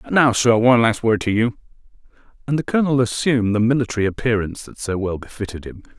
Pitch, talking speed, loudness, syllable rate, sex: 115 Hz, 190 wpm, -19 LUFS, 6.7 syllables/s, male